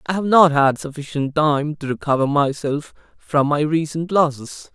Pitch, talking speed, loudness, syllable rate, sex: 150 Hz, 165 wpm, -19 LUFS, 4.6 syllables/s, male